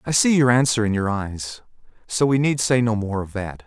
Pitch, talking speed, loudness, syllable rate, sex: 120 Hz, 245 wpm, -20 LUFS, 5.1 syllables/s, male